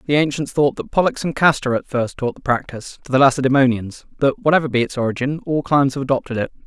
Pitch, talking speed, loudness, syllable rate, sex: 135 Hz, 225 wpm, -18 LUFS, 6.6 syllables/s, male